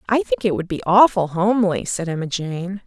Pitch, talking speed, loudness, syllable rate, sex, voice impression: 190 Hz, 210 wpm, -19 LUFS, 5.3 syllables/s, female, feminine, adult-like, tensed, slightly bright, clear, fluent, intellectual, friendly, reassuring, elegant, lively